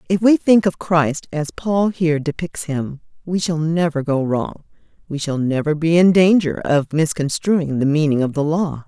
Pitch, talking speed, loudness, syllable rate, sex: 160 Hz, 190 wpm, -18 LUFS, 4.6 syllables/s, female